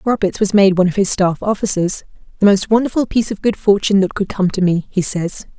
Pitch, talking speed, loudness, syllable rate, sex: 195 Hz, 225 wpm, -16 LUFS, 6.2 syllables/s, female